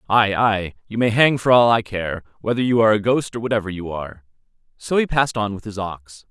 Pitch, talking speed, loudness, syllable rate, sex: 110 Hz, 240 wpm, -19 LUFS, 5.9 syllables/s, male